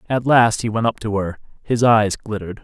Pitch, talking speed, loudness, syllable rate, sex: 110 Hz, 230 wpm, -18 LUFS, 5.4 syllables/s, male